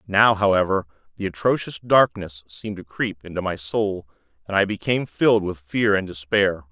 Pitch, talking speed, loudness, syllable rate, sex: 95 Hz, 170 wpm, -22 LUFS, 5.3 syllables/s, male